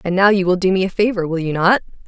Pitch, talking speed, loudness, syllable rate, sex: 185 Hz, 320 wpm, -17 LUFS, 6.9 syllables/s, female